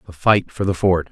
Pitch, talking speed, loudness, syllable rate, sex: 90 Hz, 270 wpm, -18 LUFS, 5.3 syllables/s, male